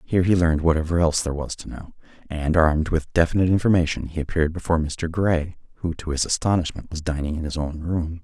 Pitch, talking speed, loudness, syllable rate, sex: 80 Hz, 210 wpm, -22 LUFS, 6.7 syllables/s, male